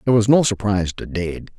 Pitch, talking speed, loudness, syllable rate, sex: 105 Hz, 225 wpm, -19 LUFS, 5.6 syllables/s, male